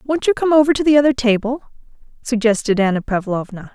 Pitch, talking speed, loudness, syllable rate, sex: 245 Hz, 175 wpm, -16 LUFS, 6.0 syllables/s, female